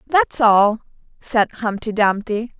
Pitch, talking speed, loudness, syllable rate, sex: 225 Hz, 115 wpm, -18 LUFS, 3.6 syllables/s, female